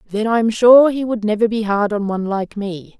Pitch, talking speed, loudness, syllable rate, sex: 215 Hz, 260 wpm, -16 LUFS, 5.3 syllables/s, female